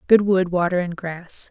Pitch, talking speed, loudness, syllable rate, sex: 180 Hz, 200 wpm, -21 LUFS, 4.4 syllables/s, female